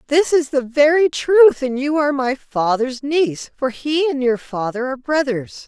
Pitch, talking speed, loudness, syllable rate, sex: 275 Hz, 190 wpm, -18 LUFS, 4.6 syllables/s, female